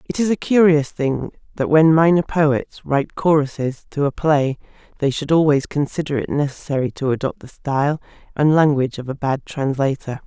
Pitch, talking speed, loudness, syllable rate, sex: 145 Hz, 175 wpm, -19 LUFS, 5.2 syllables/s, female